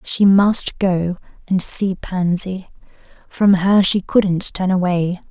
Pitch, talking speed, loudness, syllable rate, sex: 185 Hz, 135 wpm, -17 LUFS, 3.3 syllables/s, female